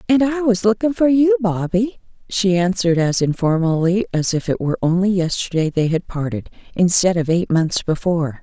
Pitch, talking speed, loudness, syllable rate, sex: 185 Hz, 180 wpm, -18 LUFS, 5.3 syllables/s, female